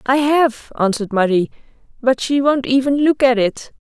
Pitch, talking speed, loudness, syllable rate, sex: 255 Hz, 175 wpm, -17 LUFS, 4.9 syllables/s, female